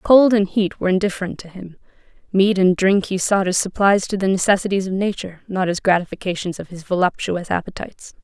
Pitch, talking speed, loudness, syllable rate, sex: 190 Hz, 190 wpm, -19 LUFS, 6.0 syllables/s, female